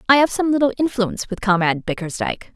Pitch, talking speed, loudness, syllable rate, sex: 225 Hz, 190 wpm, -19 LUFS, 6.9 syllables/s, female